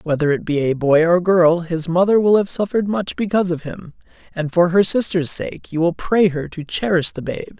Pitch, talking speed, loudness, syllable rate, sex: 175 Hz, 230 wpm, -18 LUFS, 5.3 syllables/s, male